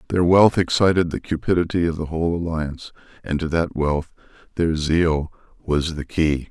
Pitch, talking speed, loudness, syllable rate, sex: 80 Hz, 165 wpm, -21 LUFS, 5.0 syllables/s, male